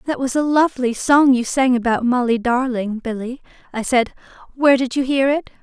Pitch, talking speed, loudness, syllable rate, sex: 255 Hz, 190 wpm, -18 LUFS, 5.4 syllables/s, female